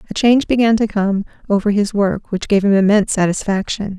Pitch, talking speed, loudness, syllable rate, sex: 205 Hz, 195 wpm, -16 LUFS, 6.0 syllables/s, female